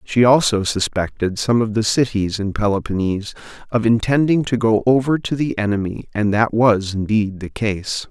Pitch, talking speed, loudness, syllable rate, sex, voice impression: 110 Hz, 170 wpm, -18 LUFS, 4.9 syllables/s, male, very masculine, very adult-like, thick, sincere, slightly calm, slightly friendly